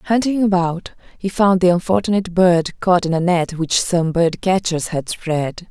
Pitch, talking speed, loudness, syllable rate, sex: 180 Hz, 170 wpm, -17 LUFS, 4.4 syllables/s, female